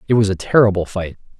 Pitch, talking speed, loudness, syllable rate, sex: 100 Hz, 215 wpm, -17 LUFS, 6.9 syllables/s, male